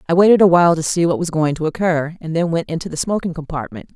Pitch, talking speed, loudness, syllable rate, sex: 165 Hz, 260 wpm, -17 LUFS, 6.8 syllables/s, female